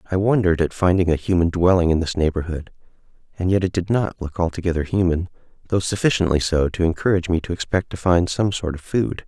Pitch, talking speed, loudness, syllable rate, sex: 90 Hz, 205 wpm, -20 LUFS, 6.3 syllables/s, male